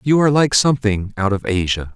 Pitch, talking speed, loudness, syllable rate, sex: 115 Hz, 215 wpm, -17 LUFS, 6.0 syllables/s, male